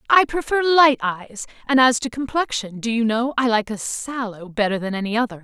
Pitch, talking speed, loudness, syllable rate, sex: 240 Hz, 210 wpm, -20 LUFS, 5.3 syllables/s, female